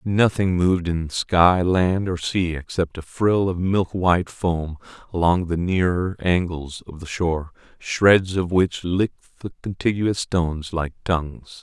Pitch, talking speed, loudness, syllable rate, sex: 90 Hz, 150 wpm, -21 LUFS, 4.0 syllables/s, male